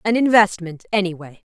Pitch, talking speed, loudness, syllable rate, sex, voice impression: 190 Hz, 120 wpm, -18 LUFS, 5.4 syllables/s, female, feminine, adult-like, tensed, powerful, bright, clear, fluent, intellectual, friendly, elegant, slightly sharp